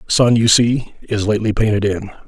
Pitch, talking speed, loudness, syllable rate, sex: 110 Hz, 185 wpm, -16 LUFS, 5.9 syllables/s, male